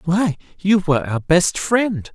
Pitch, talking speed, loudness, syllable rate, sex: 175 Hz, 170 wpm, -18 LUFS, 4.0 syllables/s, male